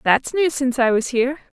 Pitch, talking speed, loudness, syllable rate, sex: 265 Hz, 230 wpm, -19 LUFS, 6.0 syllables/s, female